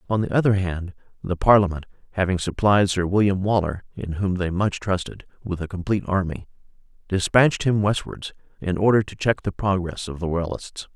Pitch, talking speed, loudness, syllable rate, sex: 95 Hz, 175 wpm, -22 LUFS, 5.5 syllables/s, male